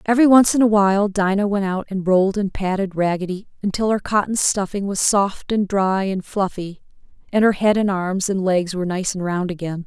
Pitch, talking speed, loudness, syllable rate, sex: 195 Hz, 215 wpm, -19 LUFS, 5.4 syllables/s, female